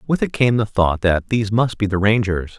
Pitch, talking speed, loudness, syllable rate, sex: 105 Hz, 255 wpm, -18 LUFS, 5.3 syllables/s, male